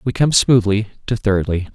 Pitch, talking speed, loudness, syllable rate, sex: 110 Hz, 170 wpm, -17 LUFS, 4.8 syllables/s, male